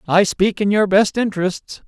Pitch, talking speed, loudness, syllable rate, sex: 200 Hz, 190 wpm, -17 LUFS, 4.8 syllables/s, male